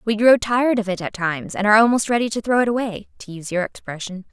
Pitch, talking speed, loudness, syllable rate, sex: 215 Hz, 265 wpm, -19 LUFS, 6.9 syllables/s, female